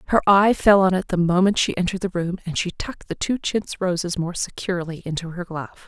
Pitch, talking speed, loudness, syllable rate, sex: 185 Hz, 235 wpm, -21 LUFS, 6.2 syllables/s, female